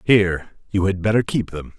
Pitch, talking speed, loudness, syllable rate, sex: 95 Hz, 200 wpm, -21 LUFS, 5.2 syllables/s, male